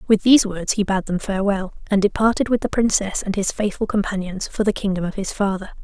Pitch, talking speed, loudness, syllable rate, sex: 200 Hz, 225 wpm, -20 LUFS, 6.1 syllables/s, female